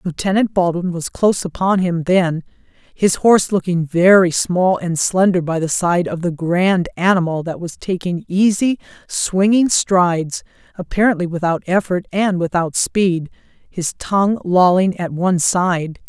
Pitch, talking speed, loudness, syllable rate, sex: 180 Hz, 145 wpm, -17 LUFS, 4.4 syllables/s, female